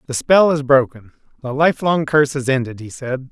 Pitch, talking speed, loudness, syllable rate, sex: 135 Hz, 200 wpm, -16 LUFS, 5.3 syllables/s, male